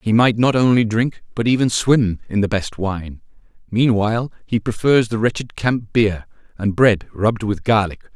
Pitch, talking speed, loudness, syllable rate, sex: 110 Hz, 175 wpm, -18 LUFS, 4.7 syllables/s, male